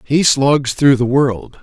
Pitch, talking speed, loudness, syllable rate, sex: 135 Hz, 185 wpm, -14 LUFS, 3.3 syllables/s, male